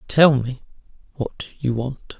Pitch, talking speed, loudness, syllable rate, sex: 130 Hz, 135 wpm, -21 LUFS, 3.7 syllables/s, male